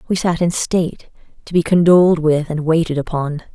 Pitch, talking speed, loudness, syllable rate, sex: 165 Hz, 185 wpm, -16 LUFS, 5.4 syllables/s, female